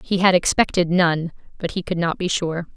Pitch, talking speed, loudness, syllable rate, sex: 175 Hz, 215 wpm, -20 LUFS, 5.1 syllables/s, female